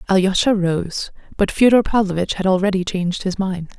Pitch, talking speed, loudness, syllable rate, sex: 190 Hz, 160 wpm, -18 LUFS, 5.5 syllables/s, female